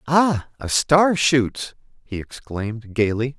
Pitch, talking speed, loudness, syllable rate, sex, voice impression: 130 Hz, 125 wpm, -20 LUFS, 3.5 syllables/s, male, very masculine, very adult-like, very middle-aged, very thick, slightly tensed, powerful, bright, soft, clear, fluent, cool, intellectual, slightly refreshing, very sincere, very calm, very mature, friendly, reassuring, slightly unique, wild, slightly sweet, lively, kind, slightly intense